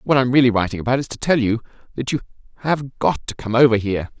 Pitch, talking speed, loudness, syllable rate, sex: 125 Hz, 255 wpm, -19 LUFS, 7.0 syllables/s, male